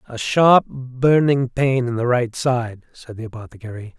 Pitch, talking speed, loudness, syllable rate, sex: 125 Hz, 165 wpm, -18 LUFS, 4.3 syllables/s, male